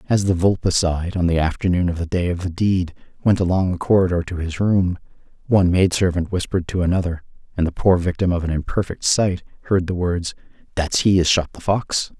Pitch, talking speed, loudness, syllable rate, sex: 90 Hz, 200 wpm, -20 LUFS, 5.8 syllables/s, male